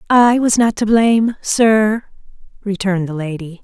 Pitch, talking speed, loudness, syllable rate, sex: 210 Hz, 150 wpm, -15 LUFS, 4.5 syllables/s, female